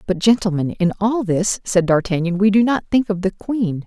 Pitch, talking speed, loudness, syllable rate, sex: 195 Hz, 215 wpm, -18 LUFS, 5.0 syllables/s, female